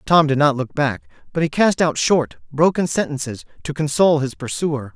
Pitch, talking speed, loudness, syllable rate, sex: 150 Hz, 195 wpm, -19 LUFS, 5.2 syllables/s, male